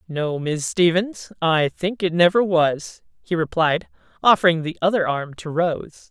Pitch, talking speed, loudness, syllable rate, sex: 170 Hz, 155 wpm, -20 LUFS, 4.2 syllables/s, female